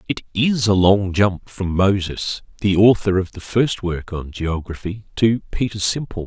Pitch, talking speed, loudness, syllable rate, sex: 100 Hz, 170 wpm, -19 LUFS, 4.3 syllables/s, male